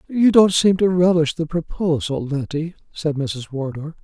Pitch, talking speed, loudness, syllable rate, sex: 160 Hz, 165 wpm, -19 LUFS, 4.5 syllables/s, male